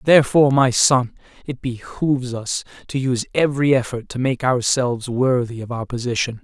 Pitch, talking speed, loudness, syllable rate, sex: 125 Hz, 160 wpm, -19 LUFS, 5.5 syllables/s, male